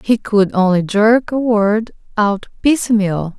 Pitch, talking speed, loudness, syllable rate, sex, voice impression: 215 Hz, 140 wpm, -15 LUFS, 3.7 syllables/s, female, feminine, adult-like, weak, soft, slightly halting, intellectual, calm, friendly, reassuring, elegant, kind, slightly modest